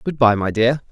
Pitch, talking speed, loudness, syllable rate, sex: 120 Hz, 265 wpm, -17 LUFS, 5.3 syllables/s, male